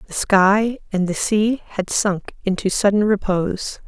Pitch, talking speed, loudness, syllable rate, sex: 205 Hz, 155 wpm, -19 LUFS, 4.1 syllables/s, female